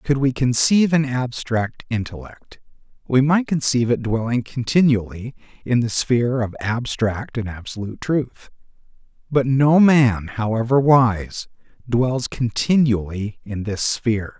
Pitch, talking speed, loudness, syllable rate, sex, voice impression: 120 Hz, 125 wpm, -19 LUFS, 4.2 syllables/s, male, very masculine, very adult-like, old, very thick, slightly relaxed, powerful, slightly bright, soft, muffled, fluent, slightly raspy, very cool, intellectual, sincere, very calm, very mature, friendly, very reassuring, very unique, elegant, wild, very sweet, slightly lively, very kind, slightly modest